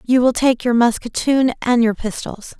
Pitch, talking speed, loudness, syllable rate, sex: 240 Hz, 185 wpm, -17 LUFS, 4.4 syllables/s, female